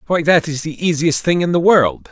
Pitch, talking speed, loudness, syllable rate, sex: 160 Hz, 255 wpm, -15 LUFS, 5.1 syllables/s, male